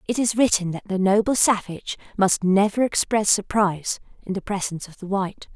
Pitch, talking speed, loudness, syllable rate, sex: 200 Hz, 185 wpm, -22 LUFS, 5.7 syllables/s, female